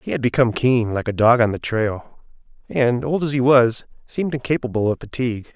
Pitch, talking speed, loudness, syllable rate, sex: 120 Hz, 205 wpm, -19 LUFS, 5.6 syllables/s, male